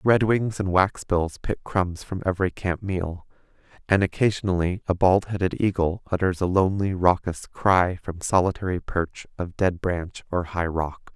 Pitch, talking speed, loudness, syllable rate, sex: 90 Hz, 155 wpm, -24 LUFS, 4.5 syllables/s, male